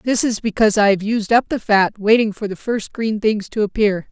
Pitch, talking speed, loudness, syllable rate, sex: 215 Hz, 250 wpm, -18 LUFS, 5.3 syllables/s, female